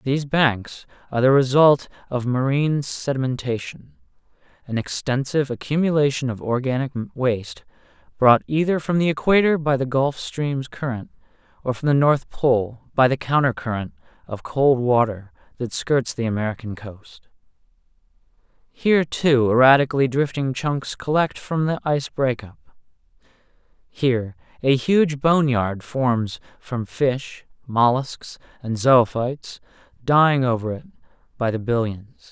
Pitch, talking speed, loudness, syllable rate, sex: 130 Hz, 125 wpm, -21 LUFS, 4.5 syllables/s, male